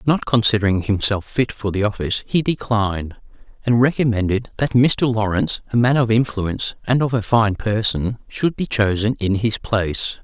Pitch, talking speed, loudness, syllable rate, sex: 110 Hz, 170 wpm, -19 LUFS, 5.1 syllables/s, male